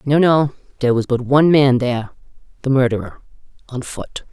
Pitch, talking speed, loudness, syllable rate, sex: 130 Hz, 165 wpm, -17 LUFS, 5.8 syllables/s, female